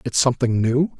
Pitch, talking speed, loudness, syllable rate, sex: 125 Hz, 180 wpm, -20 LUFS, 5.6 syllables/s, male